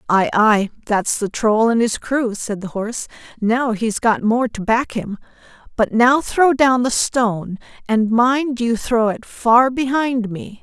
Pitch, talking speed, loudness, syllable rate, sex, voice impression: 230 Hz, 180 wpm, -17 LUFS, 3.9 syllables/s, female, slightly feminine, slightly young, clear, slightly intense, sharp